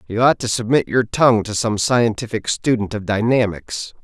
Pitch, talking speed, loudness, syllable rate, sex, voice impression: 110 Hz, 180 wpm, -18 LUFS, 5.0 syllables/s, male, very masculine, middle-aged, very thick, very tensed, powerful, bright, slightly hard, clear, fluent, slightly raspy, cool, very intellectual, slightly refreshing, sincere, calm, very friendly, very reassuring, unique, elegant, slightly wild, sweet, lively, kind, slightly intense